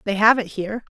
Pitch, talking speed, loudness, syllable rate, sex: 210 Hz, 250 wpm, -20 LUFS, 6.7 syllables/s, female